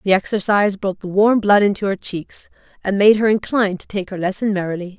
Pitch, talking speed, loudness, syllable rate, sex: 200 Hz, 215 wpm, -18 LUFS, 5.9 syllables/s, female